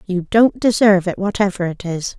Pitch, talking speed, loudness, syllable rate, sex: 195 Hz, 190 wpm, -17 LUFS, 5.4 syllables/s, female